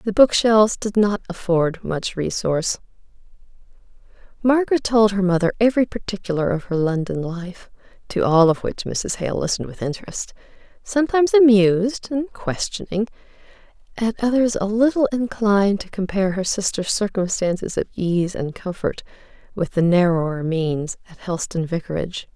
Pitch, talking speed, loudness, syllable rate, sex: 195 Hz, 140 wpm, -20 LUFS, 5.3 syllables/s, female